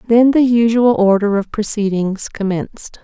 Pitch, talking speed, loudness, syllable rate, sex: 215 Hz, 140 wpm, -15 LUFS, 4.7 syllables/s, female